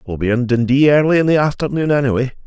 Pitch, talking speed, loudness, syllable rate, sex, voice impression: 135 Hz, 220 wpm, -15 LUFS, 6.9 syllables/s, male, masculine, adult-like, tensed, powerful, slightly hard, muffled, slightly raspy, cool, calm, mature, wild, slightly lively, slightly strict, slightly modest